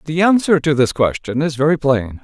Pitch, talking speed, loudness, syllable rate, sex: 145 Hz, 215 wpm, -16 LUFS, 5.3 syllables/s, male